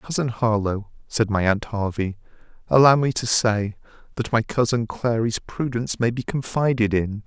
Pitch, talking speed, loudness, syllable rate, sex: 115 Hz, 155 wpm, -22 LUFS, 4.9 syllables/s, male